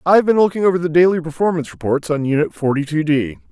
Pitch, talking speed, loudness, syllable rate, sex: 160 Hz, 220 wpm, -17 LUFS, 7.0 syllables/s, male